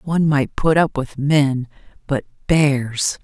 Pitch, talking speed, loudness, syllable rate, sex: 145 Hz, 150 wpm, -18 LUFS, 3.5 syllables/s, female